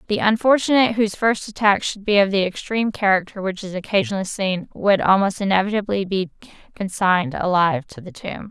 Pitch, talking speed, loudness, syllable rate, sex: 200 Hz, 170 wpm, -20 LUFS, 6.0 syllables/s, female